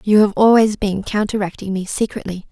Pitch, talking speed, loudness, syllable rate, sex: 205 Hz, 165 wpm, -17 LUFS, 5.5 syllables/s, female